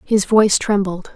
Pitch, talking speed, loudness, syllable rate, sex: 200 Hz, 155 wpm, -16 LUFS, 4.8 syllables/s, female